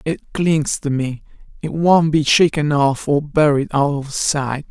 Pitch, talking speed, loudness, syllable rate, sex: 150 Hz, 180 wpm, -17 LUFS, 3.9 syllables/s, male